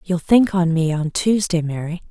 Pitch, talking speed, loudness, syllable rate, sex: 175 Hz, 200 wpm, -18 LUFS, 4.6 syllables/s, female